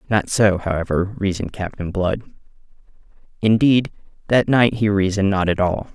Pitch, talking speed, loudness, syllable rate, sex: 100 Hz, 140 wpm, -19 LUFS, 5.2 syllables/s, male